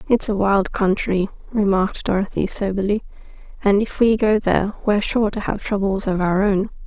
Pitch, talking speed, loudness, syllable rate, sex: 200 Hz, 175 wpm, -20 LUFS, 5.4 syllables/s, female